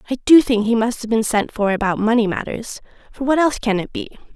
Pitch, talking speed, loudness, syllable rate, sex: 230 Hz, 250 wpm, -18 LUFS, 6.1 syllables/s, female